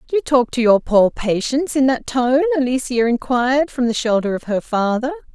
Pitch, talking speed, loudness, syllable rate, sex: 250 Hz, 200 wpm, -18 LUFS, 5.2 syllables/s, female